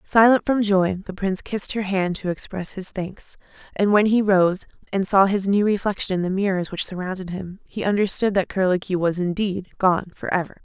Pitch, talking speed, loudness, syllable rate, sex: 190 Hz, 205 wpm, -22 LUFS, 5.3 syllables/s, female